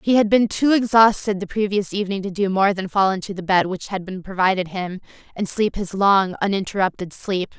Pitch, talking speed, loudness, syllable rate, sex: 195 Hz, 215 wpm, -20 LUFS, 5.5 syllables/s, female